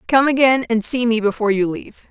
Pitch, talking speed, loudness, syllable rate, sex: 230 Hz, 230 wpm, -17 LUFS, 6.2 syllables/s, female